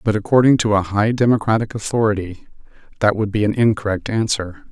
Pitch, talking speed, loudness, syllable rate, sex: 110 Hz, 165 wpm, -18 LUFS, 5.9 syllables/s, male